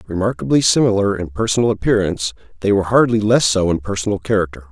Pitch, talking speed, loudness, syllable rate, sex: 100 Hz, 165 wpm, -17 LUFS, 6.9 syllables/s, male